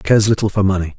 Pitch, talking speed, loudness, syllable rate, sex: 100 Hz, 245 wpm, -16 LUFS, 7.4 syllables/s, male